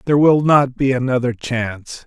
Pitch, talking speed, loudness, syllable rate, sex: 130 Hz, 175 wpm, -16 LUFS, 5.2 syllables/s, male